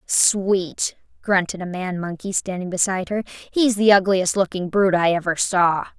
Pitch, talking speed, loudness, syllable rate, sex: 190 Hz, 160 wpm, -20 LUFS, 4.7 syllables/s, female